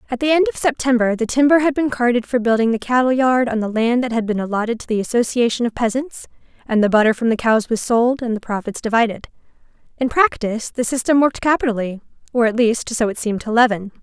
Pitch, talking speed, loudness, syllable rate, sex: 235 Hz, 220 wpm, -18 LUFS, 6.3 syllables/s, female